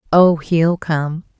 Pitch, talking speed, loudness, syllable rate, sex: 165 Hz, 130 wpm, -16 LUFS, 3.0 syllables/s, female